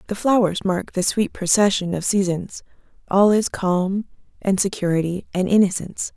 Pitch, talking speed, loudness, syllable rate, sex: 190 Hz, 135 wpm, -20 LUFS, 5.0 syllables/s, female